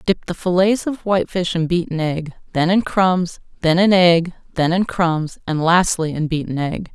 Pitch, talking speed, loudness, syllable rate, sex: 175 Hz, 190 wpm, -18 LUFS, 4.6 syllables/s, female